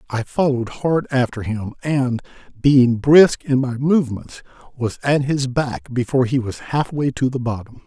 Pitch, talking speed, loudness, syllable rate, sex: 130 Hz, 170 wpm, -19 LUFS, 4.6 syllables/s, male